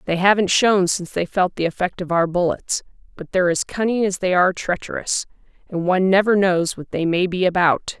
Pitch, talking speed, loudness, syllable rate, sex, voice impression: 185 Hz, 210 wpm, -19 LUFS, 5.6 syllables/s, female, feminine, very adult-like, intellectual, slightly unique, slightly sharp